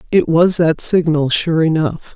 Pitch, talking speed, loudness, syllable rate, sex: 160 Hz, 165 wpm, -15 LUFS, 4.2 syllables/s, female